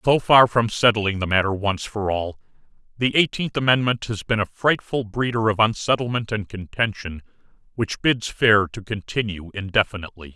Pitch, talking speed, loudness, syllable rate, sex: 110 Hz, 155 wpm, -21 LUFS, 5.0 syllables/s, male